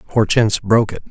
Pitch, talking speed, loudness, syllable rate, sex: 105 Hz, 165 wpm, -16 LUFS, 5.9 syllables/s, male